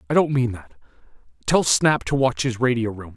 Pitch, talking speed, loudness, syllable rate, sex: 120 Hz, 210 wpm, -21 LUFS, 5.3 syllables/s, male